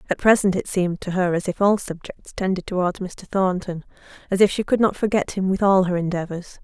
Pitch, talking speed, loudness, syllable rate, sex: 185 Hz, 225 wpm, -21 LUFS, 5.7 syllables/s, female